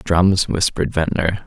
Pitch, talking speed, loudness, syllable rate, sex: 85 Hz, 125 wpm, -18 LUFS, 4.4 syllables/s, male